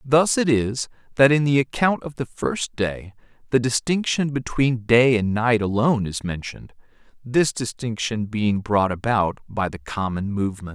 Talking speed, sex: 180 wpm, male